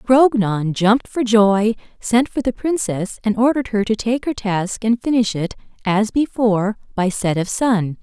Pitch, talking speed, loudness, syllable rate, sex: 220 Hz, 180 wpm, -18 LUFS, 4.4 syllables/s, female